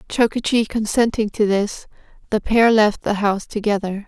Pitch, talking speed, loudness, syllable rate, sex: 210 Hz, 145 wpm, -19 LUFS, 4.9 syllables/s, female